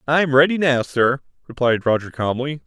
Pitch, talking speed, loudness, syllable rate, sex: 135 Hz, 160 wpm, -19 LUFS, 5.0 syllables/s, male